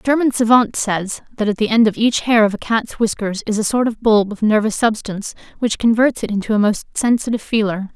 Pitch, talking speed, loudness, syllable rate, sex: 220 Hz, 235 wpm, -17 LUFS, 5.8 syllables/s, female